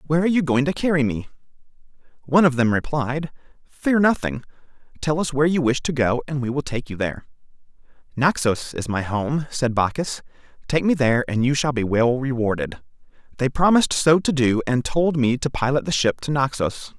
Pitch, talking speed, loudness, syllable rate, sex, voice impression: 135 Hz, 195 wpm, -21 LUFS, 5.5 syllables/s, male, very masculine, very adult-like, middle-aged, thick, slightly relaxed, slightly weak, slightly dark, very soft, clear, fluent, slightly raspy, cool, very intellectual, refreshing, very sincere, very calm, slightly mature, very friendly, very reassuring, unique, very elegant, very sweet, lively, kind, modest